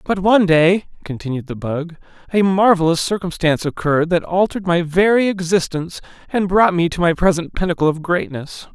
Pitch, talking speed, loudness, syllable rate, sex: 175 Hz, 165 wpm, -17 LUFS, 5.7 syllables/s, male